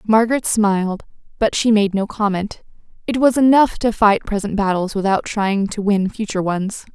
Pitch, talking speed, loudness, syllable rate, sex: 210 Hz, 165 wpm, -18 LUFS, 5.0 syllables/s, female